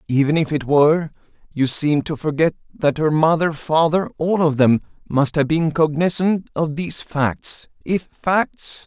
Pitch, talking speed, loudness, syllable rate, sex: 155 Hz, 140 wpm, -19 LUFS, 4.3 syllables/s, male